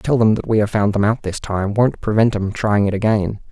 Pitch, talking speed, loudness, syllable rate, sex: 105 Hz, 290 wpm, -18 LUFS, 5.6 syllables/s, male